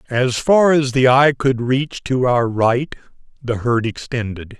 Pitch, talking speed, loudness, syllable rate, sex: 125 Hz, 170 wpm, -17 LUFS, 3.8 syllables/s, male